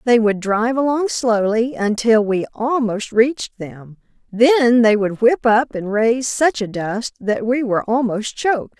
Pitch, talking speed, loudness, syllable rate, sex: 230 Hz, 170 wpm, -17 LUFS, 4.3 syllables/s, female